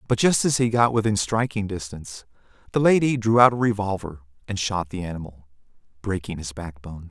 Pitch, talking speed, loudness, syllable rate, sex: 100 Hz, 175 wpm, -22 LUFS, 5.8 syllables/s, male